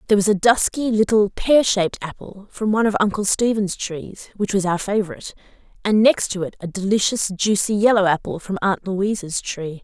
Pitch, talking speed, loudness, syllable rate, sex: 200 Hz, 175 wpm, -19 LUFS, 5.5 syllables/s, female